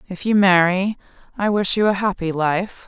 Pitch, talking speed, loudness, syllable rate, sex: 190 Hz, 190 wpm, -18 LUFS, 4.7 syllables/s, female